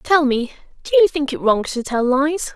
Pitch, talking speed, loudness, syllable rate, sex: 280 Hz, 235 wpm, -18 LUFS, 4.6 syllables/s, female